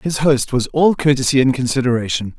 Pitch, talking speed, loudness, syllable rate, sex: 135 Hz, 175 wpm, -16 LUFS, 5.5 syllables/s, male